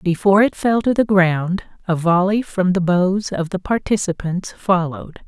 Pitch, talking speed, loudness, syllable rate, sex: 185 Hz, 170 wpm, -18 LUFS, 4.7 syllables/s, female